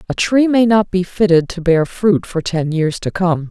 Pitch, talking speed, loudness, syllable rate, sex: 185 Hz, 240 wpm, -15 LUFS, 4.5 syllables/s, female